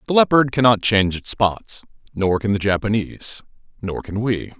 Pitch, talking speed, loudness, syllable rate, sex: 105 Hz, 170 wpm, -19 LUFS, 5.2 syllables/s, male